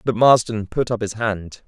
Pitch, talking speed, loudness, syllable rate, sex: 110 Hz, 215 wpm, -19 LUFS, 4.5 syllables/s, male